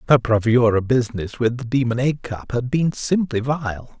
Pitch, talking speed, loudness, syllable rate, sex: 120 Hz, 180 wpm, -20 LUFS, 4.8 syllables/s, male